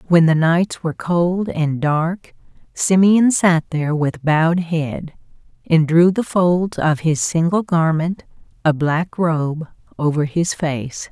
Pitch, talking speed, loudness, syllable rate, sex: 165 Hz, 145 wpm, -17 LUFS, 3.6 syllables/s, female